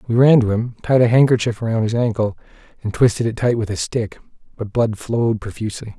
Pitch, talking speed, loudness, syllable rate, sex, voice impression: 115 Hz, 210 wpm, -18 LUFS, 5.9 syllables/s, male, masculine, adult-like, relaxed, muffled, raspy, intellectual, calm, friendly, unique, lively, kind, modest